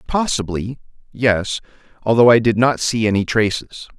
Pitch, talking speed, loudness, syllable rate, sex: 115 Hz, 135 wpm, -17 LUFS, 4.7 syllables/s, male